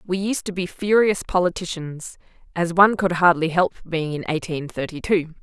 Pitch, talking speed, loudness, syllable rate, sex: 175 Hz, 175 wpm, -21 LUFS, 5.1 syllables/s, female